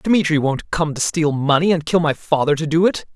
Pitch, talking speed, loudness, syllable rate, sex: 160 Hz, 245 wpm, -18 LUFS, 5.2 syllables/s, male